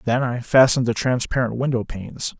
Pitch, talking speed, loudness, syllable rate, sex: 120 Hz, 175 wpm, -20 LUFS, 5.8 syllables/s, male